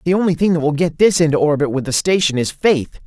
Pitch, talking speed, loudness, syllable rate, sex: 160 Hz, 275 wpm, -16 LUFS, 6.2 syllables/s, male